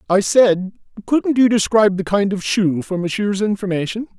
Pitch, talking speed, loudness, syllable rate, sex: 200 Hz, 170 wpm, -17 LUFS, 5.0 syllables/s, male